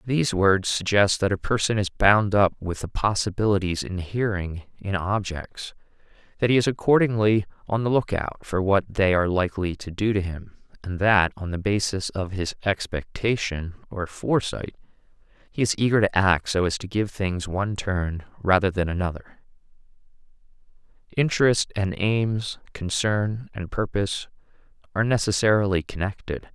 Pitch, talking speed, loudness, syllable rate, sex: 100 Hz, 145 wpm, -24 LUFS, 4.9 syllables/s, male